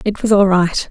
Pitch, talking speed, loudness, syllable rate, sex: 195 Hz, 265 wpm, -14 LUFS, 4.9 syllables/s, female